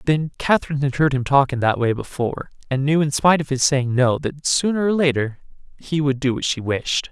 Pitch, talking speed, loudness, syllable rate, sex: 140 Hz, 245 wpm, -20 LUFS, 5.9 syllables/s, male